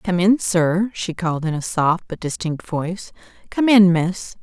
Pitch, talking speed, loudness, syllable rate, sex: 180 Hz, 190 wpm, -19 LUFS, 4.3 syllables/s, female